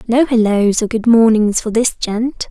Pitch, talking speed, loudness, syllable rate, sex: 225 Hz, 190 wpm, -14 LUFS, 4.3 syllables/s, female